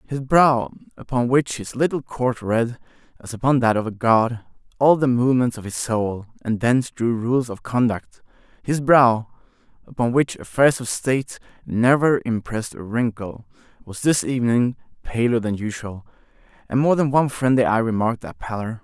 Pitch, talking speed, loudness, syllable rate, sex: 120 Hz, 160 wpm, -20 LUFS, 4.9 syllables/s, male